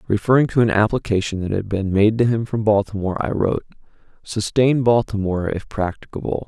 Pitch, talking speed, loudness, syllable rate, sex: 105 Hz, 165 wpm, -20 LUFS, 6.0 syllables/s, male